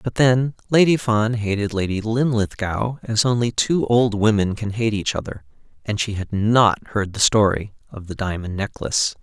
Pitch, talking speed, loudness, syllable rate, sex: 110 Hz, 170 wpm, -20 LUFS, 4.7 syllables/s, male